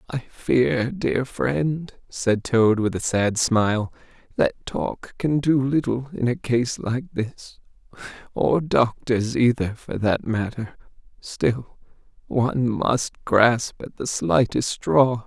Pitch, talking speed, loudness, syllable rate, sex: 120 Hz, 130 wpm, -22 LUFS, 3.3 syllables/s, male